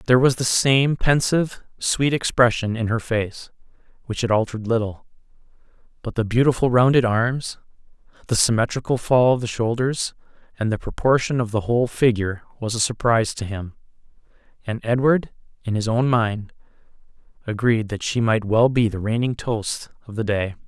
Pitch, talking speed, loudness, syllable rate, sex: 115 Hz, 160 wpm, -21 LUFS, 5.3 syllables/s, male